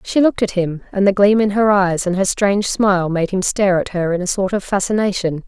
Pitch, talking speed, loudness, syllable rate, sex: 195 Hz, 265 wpm, -17 LUFS, 5.9 syllables/s, female